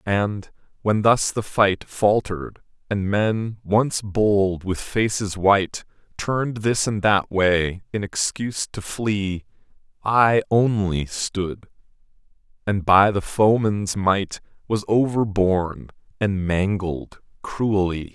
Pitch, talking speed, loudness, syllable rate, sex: 100 Hz, 115 wpm, -21 LUFS, 3.4 syllables/s, male